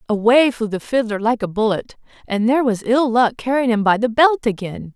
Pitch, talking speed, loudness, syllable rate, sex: 230 Hz, 220 wpm, -18 LUFS, 5.4 syllables/s, female